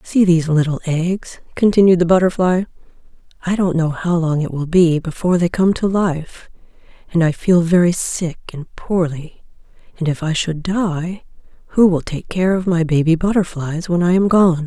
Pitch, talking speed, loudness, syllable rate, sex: 170 Hz, 180 wpm, -17 LUFS, 4.8 syllables/s, female